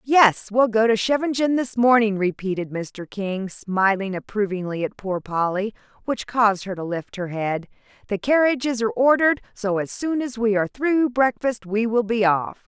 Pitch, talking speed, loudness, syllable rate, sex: 220 Hz, 180 wpm, -22 LUFS, 4.9 syllables/s, female